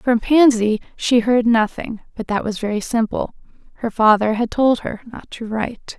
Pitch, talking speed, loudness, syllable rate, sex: 230 Hz, 180 wpm, -18 LUFS, 4.7 syllables/s, female